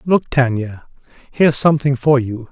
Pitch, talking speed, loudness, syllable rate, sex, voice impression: 135 Hz, 145 wpm, -16 LUFS, 5.0 syllables/s, male, very masculine, slightly old, slightly thick, sincere, slightly calm, slightly elegant, slightly kind